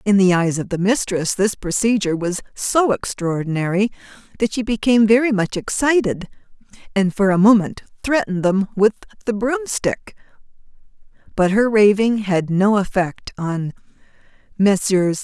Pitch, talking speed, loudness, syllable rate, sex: 200 Hz, 135 wpm, -18 LUFS, 4.7 syllables/s, female